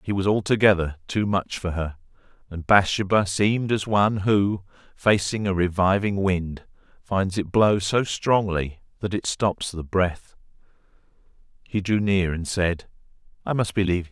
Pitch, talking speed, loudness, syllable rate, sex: 95 Hz, 155 wpm, -23 LUFS, 4.6 syllables/s, male